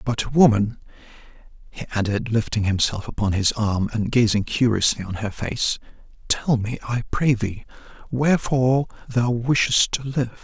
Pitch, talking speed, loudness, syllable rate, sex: 115 Hz, 145 wpm, -21 LUFS, 4.6 syllables/s, male